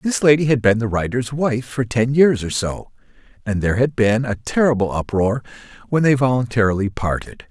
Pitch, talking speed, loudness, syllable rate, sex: 120 Hz, 185 wpm, -18 LUFS, 5.3 syllables/s, male